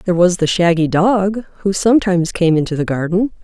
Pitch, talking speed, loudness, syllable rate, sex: 180 Hz, 190 wpm, -15 LUFS, 5.8 syllables/s, female